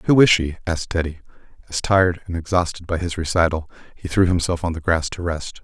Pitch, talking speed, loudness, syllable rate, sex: 85 Hz, 215 wpm, -21 LUFS, 6.1 syllables/s, male